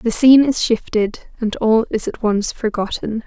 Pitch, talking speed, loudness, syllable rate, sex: 225 Hz, 185 wpm, -17 LUFS, 4.6 syllables/s, female